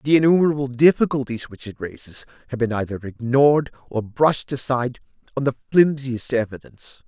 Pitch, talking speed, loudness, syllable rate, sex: 130 Hz, 145 wpm, -21 LUFS, 5.9 syllables/s, male